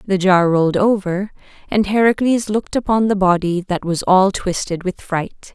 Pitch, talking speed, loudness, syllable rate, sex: 195 Hz, 175 wpm, -17 LUFS, 4.8 syllables/s, female